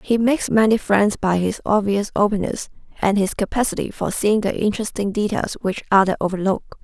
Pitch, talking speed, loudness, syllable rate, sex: 205 Hz, 165 wpm, -20 LUFS, 5.5 syllables/s, female